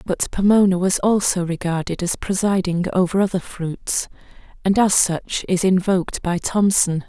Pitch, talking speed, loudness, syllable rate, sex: 185 Hz, 145 wpm, -19 LUFS, 4.6 syllables/s, female